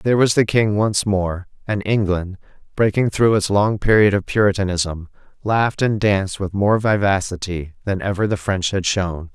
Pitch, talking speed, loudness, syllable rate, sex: 100 Hz, 175 wpm, -19 LUFS, 4.8 syllables/s, male